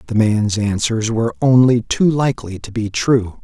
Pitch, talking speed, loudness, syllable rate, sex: 115 Hz, 175 wpm, -16 LUFS, 4.7 syllables/s, male